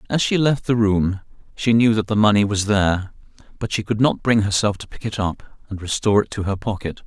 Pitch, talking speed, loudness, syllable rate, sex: 105 Hz, 240 wpm, -20 LUFS, 5.7 syllables/s, male